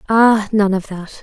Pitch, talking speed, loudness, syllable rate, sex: 205 Hz, 195 wpm, -15 LUFS, 3.9 syllables/s, female